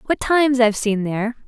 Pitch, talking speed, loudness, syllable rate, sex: 235 Hz, 205 wpm, -18 LUFS, 6.6 syllables/s, female